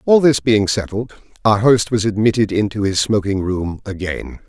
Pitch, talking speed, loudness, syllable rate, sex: 105 Hz, 175 wpm, -17 LUFS, 4.7 syllables/s, male